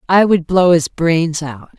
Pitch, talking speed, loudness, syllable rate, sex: 165 Hz, 200 wpm, -14 LUFS, 3.9 syllables/s, female